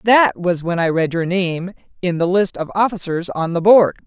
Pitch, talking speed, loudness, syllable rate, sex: 185 Hz, 220 wpm, -17 LUFS, 4.7 syllables/s, female